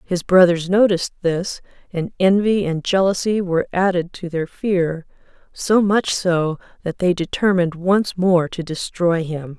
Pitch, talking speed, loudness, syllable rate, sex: 180 Hz, 150 wpm, -19 LUFS, 4.3 syllables/s, female